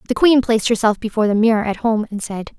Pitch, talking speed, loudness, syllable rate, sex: 220 Hz, 255 wpm, -17 LUFS, 7.0 syllables/s, female